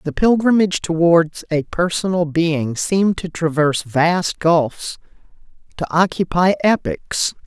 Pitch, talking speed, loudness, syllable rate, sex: 170 Hz, 115 wpm, -17 LUFS, 4.1 syllables/s, female